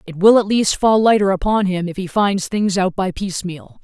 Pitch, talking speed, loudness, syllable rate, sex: 195 Hz, 235 wpm, -17 LUFS, 5.2 syllables/s, female